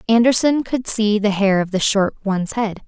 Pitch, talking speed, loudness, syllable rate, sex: 210 Hz, 210 wpm, -18 LUFS, 5.1 syllables/s, female